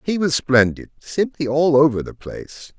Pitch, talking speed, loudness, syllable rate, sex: 145 Hz, 170 wpm, -18 LUFS, 4.6 syllables/s, male